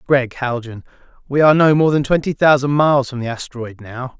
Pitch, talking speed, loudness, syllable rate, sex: 135 Hz, 200 wpm, -16 LUFS, 5.9 syllables/s, male